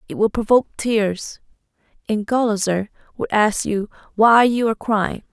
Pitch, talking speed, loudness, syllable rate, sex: 215 Hz, 145 wpm, -19 LUFS, 4.6 syllables/s, female